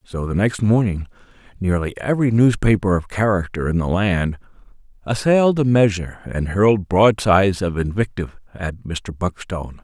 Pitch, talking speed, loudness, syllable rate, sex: 95 Hz, 140 wpm, -19 LUFS, 5.2 syllables/s, male